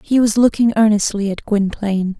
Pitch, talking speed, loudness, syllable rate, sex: 210 Hz, 165 wpm, -16 LUFS, 5.4 syllables/s, female